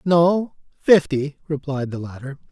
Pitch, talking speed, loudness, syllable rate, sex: 150 Hz, 120 wpm, -20 LUFS, 4.0 syllables/s, male